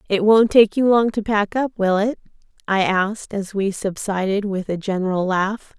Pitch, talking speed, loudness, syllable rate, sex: 205 Hz, 195 wpm, -19 LUFS, 4.7 syllables/s, female